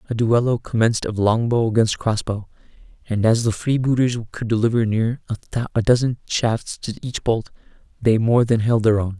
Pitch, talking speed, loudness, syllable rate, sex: 115 Hz, 170 wpm, -20 LUFS, 5.1 syllables/s, male